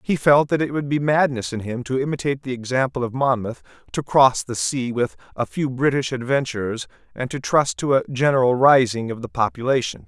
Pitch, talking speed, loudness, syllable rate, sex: 130 Hz, 205 wpm, -21 LUFS, 5.5 syllables/s, male